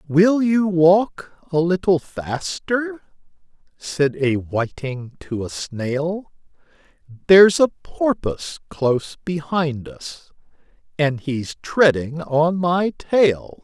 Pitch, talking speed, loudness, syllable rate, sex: 165 Hz, 105 wpm, -19 LUFS, 3.0 syllables/s, male